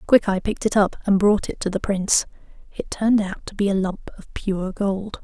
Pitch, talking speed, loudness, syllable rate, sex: 200 Hz, 230 wpm, -22 LUFS, 5.4 syllables/s, female